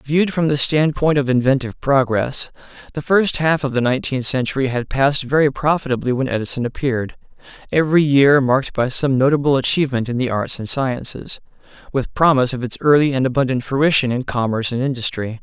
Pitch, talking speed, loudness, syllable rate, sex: 135 Hz, 170 wpm, -18 LUFS, 6.0 syllables/s, male